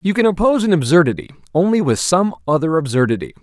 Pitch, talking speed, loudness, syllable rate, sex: 165 Hz, 175 wpm, -16 LUFS, 6.9 syllables/s, male